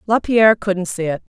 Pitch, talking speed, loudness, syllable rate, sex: 200 Hz, 180 wpm, -17 LUFS, 5.5 syllables/s, female